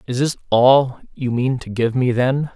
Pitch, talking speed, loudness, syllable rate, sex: 125 Hz, 210 wpm, -18 LUFS, 4.3 syllables/s, male